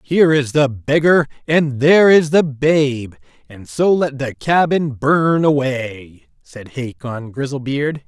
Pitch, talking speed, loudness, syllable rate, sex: 140 Hz, 140 wpm, -16 LUFS, 3.7 syllables/s, male